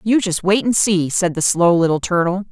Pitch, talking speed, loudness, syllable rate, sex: 185 Hz, 240 wpm, -16 LUFS, 5.1 syllables/s, female